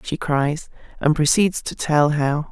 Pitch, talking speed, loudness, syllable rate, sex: 150 Hz, 165 wpm, -20 LUFS, 3.8 syllables/s, female